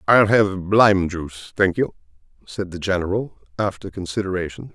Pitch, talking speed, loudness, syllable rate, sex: 95 Hz, 140 wpm, -21 LUFS, 4.9 syllables/s, male